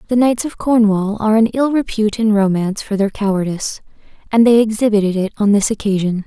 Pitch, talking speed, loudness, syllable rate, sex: 210 Hz, 190 wpm, -16 LUFS, 6.1 syllables/s, female